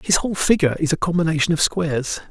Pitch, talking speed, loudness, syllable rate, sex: 165 Hz, 210 wpm, -19 LUFS, 7.0 syllables/s, male